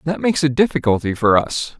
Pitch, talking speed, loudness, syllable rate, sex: 135 Hz, 200 wpm, -17 LUFS, 6.0 syllables/s, male